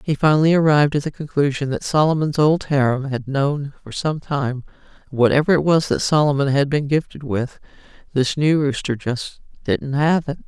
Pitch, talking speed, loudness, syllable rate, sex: 140 Hz, 175 wpm, -19 LUFS, 5.1 syllables/s, female